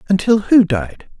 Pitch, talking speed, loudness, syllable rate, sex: 180 Hz, 150 wpm, -14 LUFS, 4.4 syllables/s, male